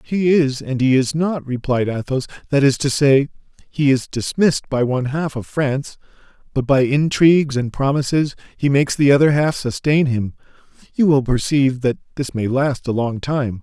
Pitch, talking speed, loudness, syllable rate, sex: 135 Hz, 185 wpm, -18 LUFS, 5.0 syllables/s, male